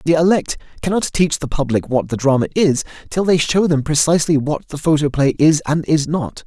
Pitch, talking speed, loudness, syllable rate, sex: 155 Hz, 205 wpm, -17 LUFS, 5.5 syllables/s, male